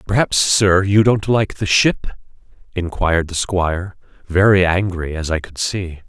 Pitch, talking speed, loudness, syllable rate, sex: 95 Hz, 160 wpm, -17 LUFS, 4.4 syllables/s, male